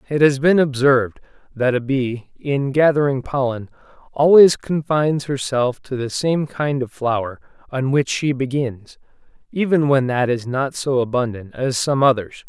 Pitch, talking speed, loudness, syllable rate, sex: 135 Hz, 160 wpm, -19 LUFS, 4.5 syllables/s, male